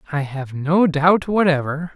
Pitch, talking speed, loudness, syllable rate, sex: 160 Hz, 155 wpm, -18 LUFS, 4.1 syllables/s, male